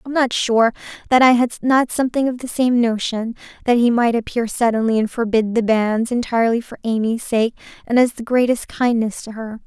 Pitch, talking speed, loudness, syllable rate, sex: 235 Hz, 200 wpm, -18 LUFS, 5.5 syllables/s, female